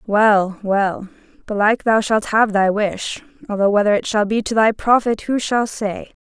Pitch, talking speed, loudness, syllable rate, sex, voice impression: 215 Hz, 185 wpm, -18 LUFS, 4.2 syllables/s, female, feminine, slightly young, slightly clear, slightly cute, friendly, slightly lively